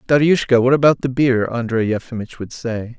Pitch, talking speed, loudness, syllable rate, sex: 125 Hz, 180 wpm, -17 LUFS, 5.3 syllables/s, male